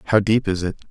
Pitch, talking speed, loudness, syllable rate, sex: 100 Hz, 265 wpm, -20 LUFS, 7.0 syllables/s, male